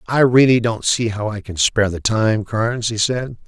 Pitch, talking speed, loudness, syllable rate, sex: 115 Hz, 225 wpm, -17 LUFS, 4.9 syllables/s, male